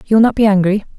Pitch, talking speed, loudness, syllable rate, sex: 205 Hz, 305 wpm, -13 LUFS, 7.7 syllables/s, female